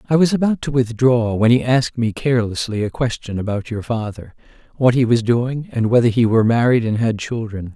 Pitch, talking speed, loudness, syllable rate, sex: 120 Hz, 210 wpm, -18 LUFS, 5.6 syllables/s, male